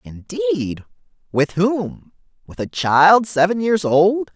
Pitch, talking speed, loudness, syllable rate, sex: 175 Hz, 110 wpm, -17 LUFS, 3.7 syllables/s, male